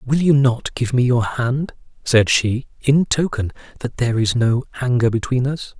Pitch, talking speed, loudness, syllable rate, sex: 125 Hz, 185 wpm, -18 LUFS, 4.5 syllables/s, male